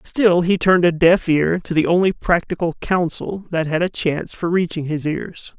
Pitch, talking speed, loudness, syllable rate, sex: 170 Hz, 205 wpm, -18 LUFS, 4.8 syllables/s, male